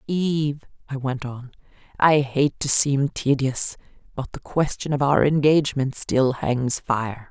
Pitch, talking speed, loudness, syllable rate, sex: 135 Hz, 140 wpm, -22 LUFS, 4.0 syllables/s, female